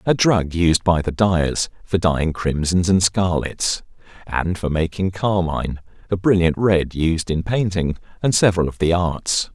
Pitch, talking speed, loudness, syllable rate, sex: 90 Hz, 165 wpm, -19 LUFS, 4.2 syllables/s, male